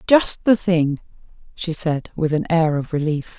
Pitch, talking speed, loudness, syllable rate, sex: 165 Hz, 175 wpm, -20 LUFS, 4.1 syllables/s, female